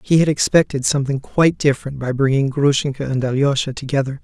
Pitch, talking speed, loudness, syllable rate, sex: 140 Hz, 170 wpm, -18 LUFS, 6.3 syllables/s, male